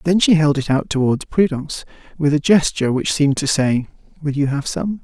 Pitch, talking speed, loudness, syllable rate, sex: 150 Hz, 215 wpm, -18 LUFS, 5.6 syllables/s, male